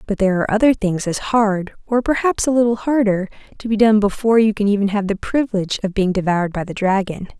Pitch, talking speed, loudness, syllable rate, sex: 210 Hz, 225 wpm, -18 LUFS, 6.4 syllables/s, female